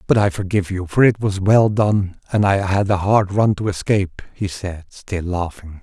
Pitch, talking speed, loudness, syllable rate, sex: 95 Hz, 215 wpm, -19 LUFS, 4.8 syllables/s, male